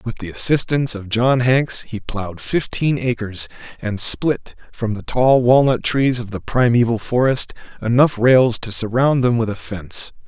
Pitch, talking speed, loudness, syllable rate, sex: 120 Hz, 170 wpm, -18 LUFS, 4.5 syllables/s, male